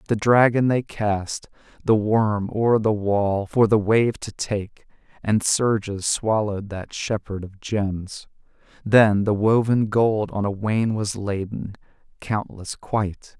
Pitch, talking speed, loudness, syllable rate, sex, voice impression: 105 Hz, 145 wpm, -22 LUFS, 3.7 syllables/s, male, very masculine, slightly adult-like, thick, relaxed, weak, dark, very soft, muffled, slightly fluent, cool, very intellectual, slightly refreshing, very sincere, very calm, slightly mature, very friendly, very reassuring, unique, elegant, slightly wild, sweet, slightly lively, kind, modest